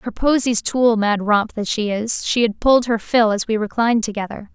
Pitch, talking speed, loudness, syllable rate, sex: 225 Hz, 225 wpm, -18 LUFS, 5.1 syllables/s, female